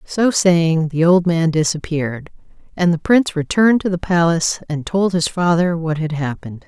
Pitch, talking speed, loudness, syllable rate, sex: 170 Hz, 180 wpm, -17 LUFS, 5.1 syllables/s, female